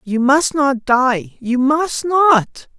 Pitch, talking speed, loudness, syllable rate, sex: 265 Hz, 130 wpm, -15 LUFS, 2.7 syllables/s, female